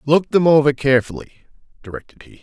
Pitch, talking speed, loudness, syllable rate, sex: 145 Hz, 150 wpm, -15 LUFS, 6.7 syllables/s, male